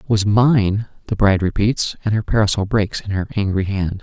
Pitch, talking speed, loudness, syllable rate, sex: 105 Hz, 195 wpm, -18 LUFS, 5.1 syllables/s, male